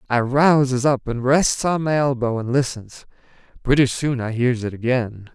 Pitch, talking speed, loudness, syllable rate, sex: 130 Hz, 180 wpm, -19 LUFS, 4.6 syllables/s, male